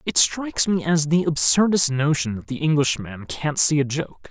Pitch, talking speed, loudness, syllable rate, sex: 150 Hz, 195 wpm, -20 LUFS, 4.8 syllables/s, male